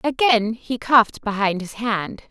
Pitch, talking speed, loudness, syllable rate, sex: 230 Hz, 155 wpm, -20 LUFS, 4.2 syllables/s, female